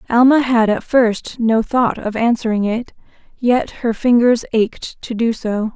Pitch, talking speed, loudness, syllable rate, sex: 230 Hz, 165 wpm, -16 LUFS, 4.0 syllables/s, female